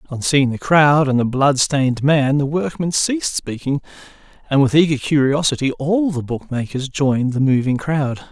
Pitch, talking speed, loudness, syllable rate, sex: 145 Hz, 165 wpm, -17 LUFS, 4.9 syllables/s, male